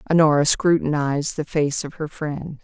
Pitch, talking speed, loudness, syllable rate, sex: 150 Hz, 160 wpm, -21 LUFS, 5.0 syllables/s, female